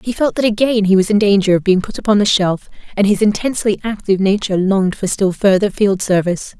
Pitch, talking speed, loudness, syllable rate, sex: 200 Hz, 225 wpm, -15 LUFS, 6.3 syllables/s, female